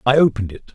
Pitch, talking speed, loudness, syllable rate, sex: 115 Hz, 240 wpm, -18 LUFS, 8.1 syllables/s, male